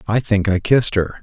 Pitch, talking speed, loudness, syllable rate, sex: 105 Hz, 245 wpm, -17 LUFS, 5.9 syllables/s, male